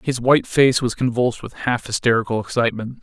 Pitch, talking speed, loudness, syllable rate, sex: 120 Hz, 180 wpm, -19 LUFS, 6.1 syllables/s, male